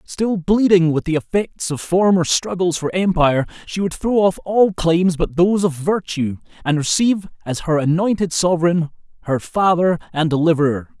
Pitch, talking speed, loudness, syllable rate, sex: 175 Hz, 165 wpm, -18 LUFS, 4.9 syllables/s, male